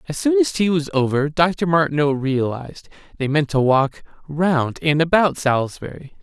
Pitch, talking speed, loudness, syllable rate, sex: 155 Hz, 165 wpm, -19 LUFS, 4.8 syllables/s, male